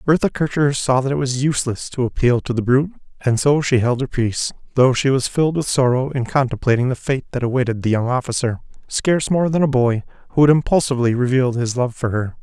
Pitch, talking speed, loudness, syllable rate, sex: 130 Hz, 220 wpm, -18 LUFS, 6.2 syllables/s, male